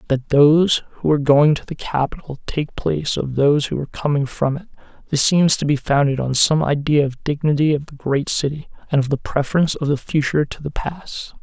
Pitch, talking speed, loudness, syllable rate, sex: 145 Hz, 215 wpm, -19 LUFS, 5.8 syllables/s, male